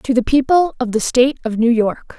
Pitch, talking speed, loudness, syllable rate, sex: 250 Hz, 245 wpm, -16 LUFS, 5.3 syllables/s, female